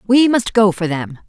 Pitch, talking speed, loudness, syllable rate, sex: 205 Hz, 235 wpm, -15 LUFS, 4.7 syllables/s, female